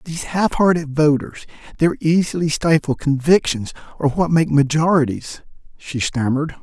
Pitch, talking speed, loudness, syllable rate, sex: 155 Hz, 125 wpm, -18 LUFS, 5.1 syllables/s, male